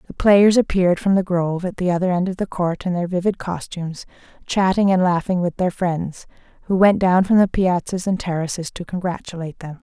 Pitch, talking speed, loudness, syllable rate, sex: 180 Hz, 205 wpm, -19 LUFS, 5.7 syllables/s, female